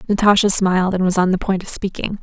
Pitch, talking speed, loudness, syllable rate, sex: 190 Hz, 240 wpm, -17 LUFS, 6.3 syllables/s, female